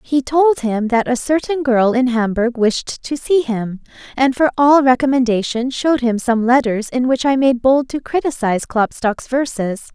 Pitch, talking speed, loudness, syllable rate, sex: 250 Hz, 180 wpm, -16 LUFS, 4.6 syllables/s, female